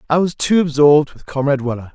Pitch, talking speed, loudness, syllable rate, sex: 145 Hz, 215 wpm, -16 LUFS, 6.8 syllables/s, male